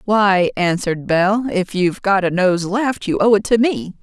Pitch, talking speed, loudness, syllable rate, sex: 190 Hz, 210 wpm, -17 LUFS, 4.5 syllables/s, female